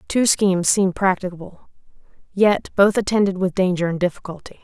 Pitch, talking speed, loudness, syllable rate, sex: 190 Hz, 140 wpm, -19 LUFS, 5.7 syllables/s, female